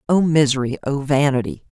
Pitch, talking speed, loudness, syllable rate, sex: 140 Hz, 135 wpm, -18 LUFS, 5.5 syllables/s, female